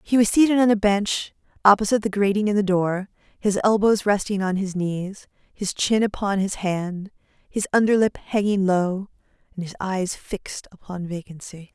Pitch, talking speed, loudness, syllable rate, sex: 195 Hz, 175 wpm, -22 LUFS, 4.9 syllables/s, female